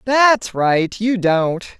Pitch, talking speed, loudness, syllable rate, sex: 205 Hz, 135 wpm, -16 LUFS, 2.6 syllables/s, female